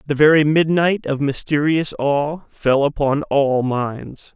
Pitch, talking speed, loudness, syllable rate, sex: 145 Hz, 140 wpm, -18 LUFS, 3.7 syllables/s, male